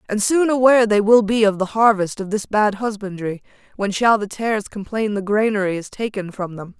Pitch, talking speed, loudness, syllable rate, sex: 210 Hz, 210 wpm, -19 LUFS, 5.4 syllables/s, female